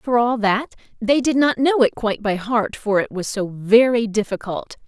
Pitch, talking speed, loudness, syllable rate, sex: 225 Hz, 210 wpm, -19 LUFS, 4.8 syllables/s, female